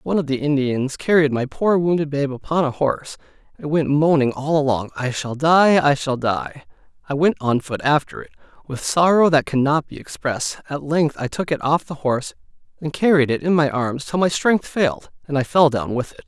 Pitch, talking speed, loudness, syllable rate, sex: 145 Hz, 215 wpm, -19 LUFS, 5.3 syllables/s, male